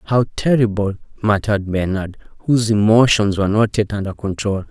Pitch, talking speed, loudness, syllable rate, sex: 105 Hz, 140 wpm, -17 LUFS, 5.4 syllables/s, male